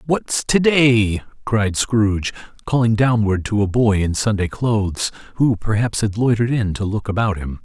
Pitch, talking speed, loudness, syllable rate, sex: 105 Hz, 175 wpm, -18 LUFS, 4.7 syllables/s, male